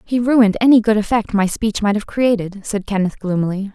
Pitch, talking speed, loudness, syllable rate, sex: 210 Hz, 210 wpm, -17 LUFS, 5.5 syllables/s, female